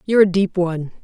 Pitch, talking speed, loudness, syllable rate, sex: 185 Hz, 230 wpm, -18 LUFS, 7.2 syllables/s, female